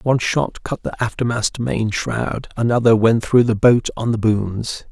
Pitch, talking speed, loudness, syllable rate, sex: 115 Hz, 185 wpm, -18 LUFS, 4.3 syllables/s, male